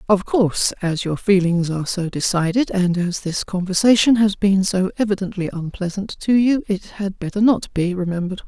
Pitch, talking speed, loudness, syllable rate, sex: 190 Hz, 175 wpm, -19 LUFS, 5.2 syllables/s, female